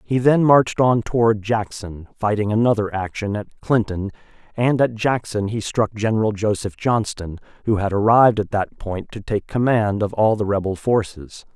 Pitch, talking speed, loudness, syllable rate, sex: 110 Hz, 170 wpm, -20 LUFS, 4.8 syllables/s, male